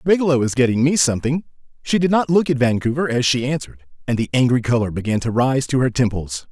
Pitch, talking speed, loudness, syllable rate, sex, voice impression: 130 Hz, 220 wpm, -18 LUFS, 6.3 syllables/s, male, very masculine, very middle-aged, very thick, very tensed, very powerful, very bright, soft, very clear, very fluent, slightly raspy, very cool, intellectual, slightly refreshing, sincere, very calm, mature, friendly, very reassuring, slightly elegant, very wild, sweet, very lively, kind, intense